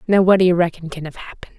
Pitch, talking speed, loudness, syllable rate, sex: 175 Hz, 265 wpm, -15 LUFS, 6.9 syllables/s, female